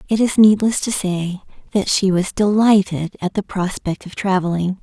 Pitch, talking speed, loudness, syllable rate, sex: 195 Hz, 175 wpm, -18 LUFS, 4.7 syllables/s, female